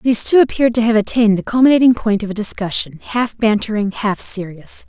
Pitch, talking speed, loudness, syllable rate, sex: 220 Hz, 185 wpm, -15 LUFS, 6.1 syllables/s, female